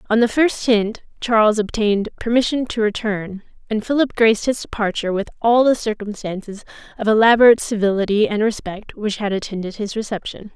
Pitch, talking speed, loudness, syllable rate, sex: 215 Hz, 160 wpm, -18 LUFS, 5.7 syllables/s, female